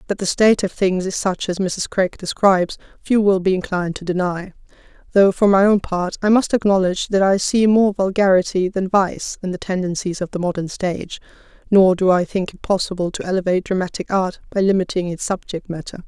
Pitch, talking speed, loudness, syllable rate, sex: 190 Hz, 200 wpm, -18 LUFS, 5.7 syllables/s, female